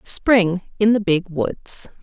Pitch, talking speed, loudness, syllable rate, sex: 190 Hz, 150 wpm, -19 LUFS, 3.0 syllables/s, female